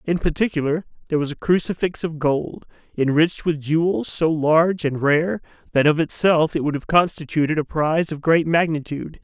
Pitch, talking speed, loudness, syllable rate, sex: 160 Hz, 175 wpm, -20 LUFS, 5.5 syllables/s, male